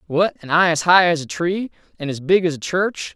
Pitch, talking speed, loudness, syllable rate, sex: 165 Hz, 265 wpm, -18 LUFS, 5.2 syllables/s, male